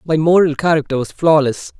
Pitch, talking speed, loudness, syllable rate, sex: 155 Hz, 165 wpm, -15 LUFS, 5.5 syllables/s, male